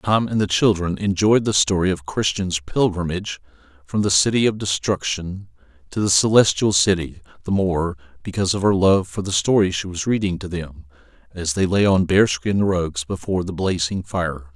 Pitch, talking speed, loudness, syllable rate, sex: 90 Hz, 175 wpm, -20 LUFS, 5.0 syllables/s, male